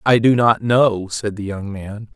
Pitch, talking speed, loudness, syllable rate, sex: 110 Hz, 225 wpm, -17 LUFS, 3.9 syllables/s, male